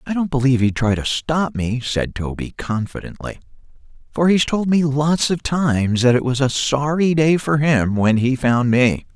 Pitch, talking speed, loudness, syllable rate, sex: 135 Hz, 195 wpm, -18 LUFS, 4.7 syllables/s, male